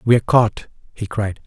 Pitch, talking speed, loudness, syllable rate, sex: 105 Hz, 165 wpm, -18 LUFS, 4.7 syllables/s, male